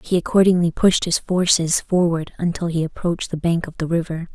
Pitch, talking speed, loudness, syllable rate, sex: 170 Hz, 195 wpm, -19 LUFS, 5.5 syllables/s, female